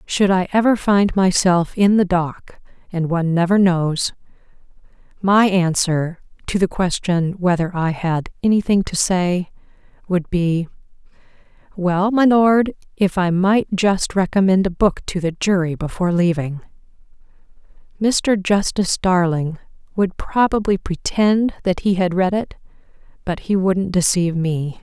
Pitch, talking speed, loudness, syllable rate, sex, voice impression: 185 Hz, 135 wpm, -18 LUFS, 4.3 syllables/s, female, very feminine, adult-like, slightly calm, slightly sweet